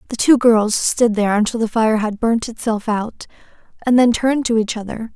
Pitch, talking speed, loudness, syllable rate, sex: 225 Hz, 210 wpm, -17 LUFS, 5.3 syllables/s, female